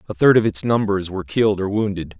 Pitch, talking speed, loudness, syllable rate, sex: 100 Hz, 245 wpm, -19 LUFS, 6.5 syllables/s, male